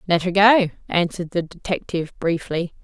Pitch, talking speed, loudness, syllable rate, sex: 175 Hz, 150 wpm, -20 LUFS, 5.5 syllables/s, female